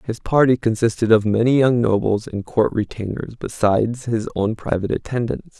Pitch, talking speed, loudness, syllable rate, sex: 110 Hz, 160 wpm, -19 LUFS, 5.2 syllables/s, male